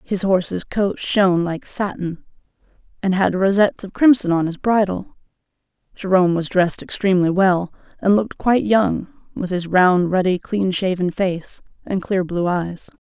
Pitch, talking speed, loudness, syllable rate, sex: 190 Hz, 155 wpm, -19 LUFS, 4.8 syllables/s, female